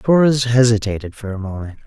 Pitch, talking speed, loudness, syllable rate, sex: 115 Hz, 160 wpm, -17 LUFS, 5.7 syllables/s, male